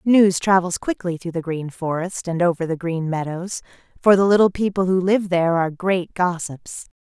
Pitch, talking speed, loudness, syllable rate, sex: 180 Hz, 190 wpm, -20 LUFS, 5.0 syllables/s, female